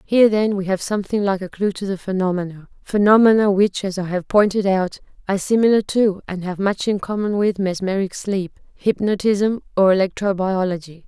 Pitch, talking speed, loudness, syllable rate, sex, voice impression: 195 Hz, 175 wpm, -19 LUFS, 5.4 syllables/s, female, very feminine, slightly young, adult-like, thin, relaxed, slightly weak, slightly dark, slightly hard, clear, fluent, cute, very intellectual, refreshing, sincere, very calm, friendly, very reassuring, unique, very elegant, sweet, slightly lively, very kind, very modest